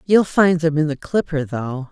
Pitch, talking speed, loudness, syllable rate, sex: 155 Hz, 220 wpm, -19 LUFS, 4.4 syllables/s, female